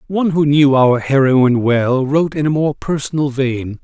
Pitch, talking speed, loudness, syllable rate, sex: 140 Hz, 190 wpm, -15 LUFS, 4.9 syllables/s, male